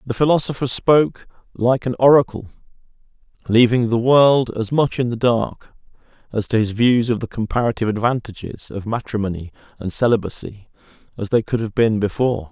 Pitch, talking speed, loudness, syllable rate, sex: 115 Hz, 155 wpm, -18 LUFS, 5.6 syllables/s, male